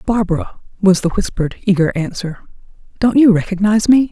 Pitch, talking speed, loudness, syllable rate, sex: 200 Hz, 145 wpm, -15 LUFS, 6.1 syllables/s, female